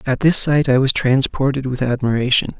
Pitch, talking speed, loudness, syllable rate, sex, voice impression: 130 Hz, 185 wpm, -16 LUFS, 5.3 syllables/s, male, very masculine, very middle-aged, thick, slightly tensed, slightly weak, slightly bright, slightly soft, slightly muffled, fluent, slightly raspy, cool, very intellectual, slightly refreshing, sincere, very calm, mature, friendly, reassuring, unique, slightly elegant, wild, sweet, lively, kind, modest